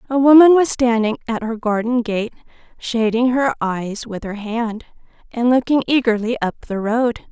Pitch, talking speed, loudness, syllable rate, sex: 235 Hz, 165 wpm, -17 LUFS, 4.7 syllables/s, female